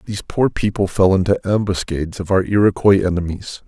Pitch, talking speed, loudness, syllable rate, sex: 95 Hz, 165 wpm, -17 LUFS, 5.7 syllables/s, male